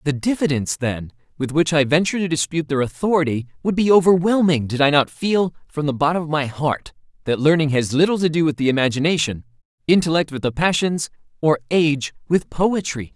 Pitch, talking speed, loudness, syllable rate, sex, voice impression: 155 Hz, 185 wpm, -19 LUFS, 5.9 syllables/s, male, masculine, adult-like, tensed, powerful, bright, clear, fluent, cool, wild, lively, slightly strict